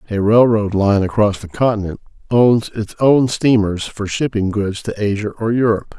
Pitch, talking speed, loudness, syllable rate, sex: 105 Hz, 170 wpm, -16 LUFS, 4.9 syllables/s, male